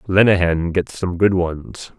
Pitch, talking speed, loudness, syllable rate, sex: 90 Hz, 150 wpm, -18 LUFS, 3.9 syllables/s, male